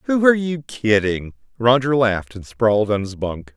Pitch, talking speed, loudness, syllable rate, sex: 120 Hz, 185 wpm, -19 LUFS, 4.9 syllables/s, male